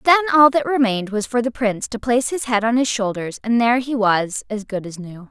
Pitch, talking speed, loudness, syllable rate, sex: 230 Hz, 250 wpm, -19 LUFS, 5.9 syllables/s, female